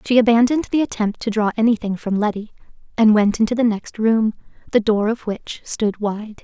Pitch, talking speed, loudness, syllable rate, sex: 220 Hz, 195 wpm, -19 LUFS, 5.4 syllables/s, female